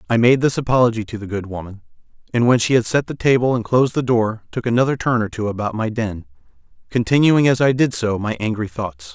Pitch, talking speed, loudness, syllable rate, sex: 115 Hz, 230 wpm, -18 LUFS, 6.1 syllables/s, male